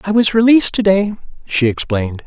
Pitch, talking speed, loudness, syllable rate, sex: 180 Hz, 185 wpm, -14 LUFS, 6.0 syllables/s, male